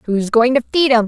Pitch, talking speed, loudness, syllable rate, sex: 240 Hz, 280 wpm, -15 LUFS, 5.0 syllables/s, female